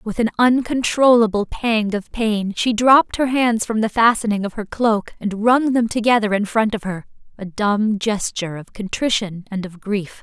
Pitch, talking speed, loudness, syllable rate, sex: 215 Hz, 180 wpm, -18 LUFS, 4.7 syllables/s, female